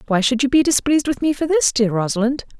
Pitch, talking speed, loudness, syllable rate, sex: 255 Hz, 280 wpm, -18 LUFS, 6.5 syllables/s, female